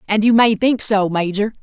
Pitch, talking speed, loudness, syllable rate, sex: 210 Hz, 220 wpm, -16 LUFS, 5.0 syllables/s, female